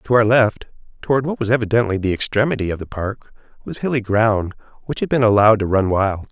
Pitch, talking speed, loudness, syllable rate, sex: 110 Hz, 210 wpm, -18 LUFS, 6.1 syllables/s, male